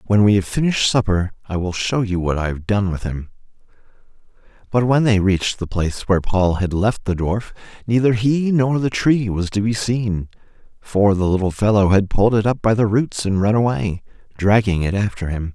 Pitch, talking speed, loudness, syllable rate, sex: 105 Hz, 210 wpm, -18 LUFS, 5.3 syllables/s, male